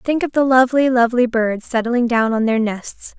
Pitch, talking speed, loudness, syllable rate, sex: 240 Hz, 205 wpm, -17 LUFS, 5.1 syllables/s, female